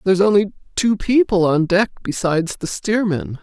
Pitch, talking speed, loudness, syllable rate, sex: 195 Hz, 160 wpm, -18 LUFS, 5.1 syllables/s, female